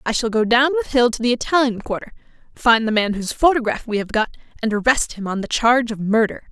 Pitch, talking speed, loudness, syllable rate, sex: 230 Hz, 240 wpm, -19 LUFS, 6.4 syllables/s, female